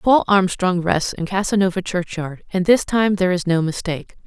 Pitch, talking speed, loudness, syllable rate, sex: 185 Hz, 185 wpm, -19 LUFS, 5.2 syllables/s, female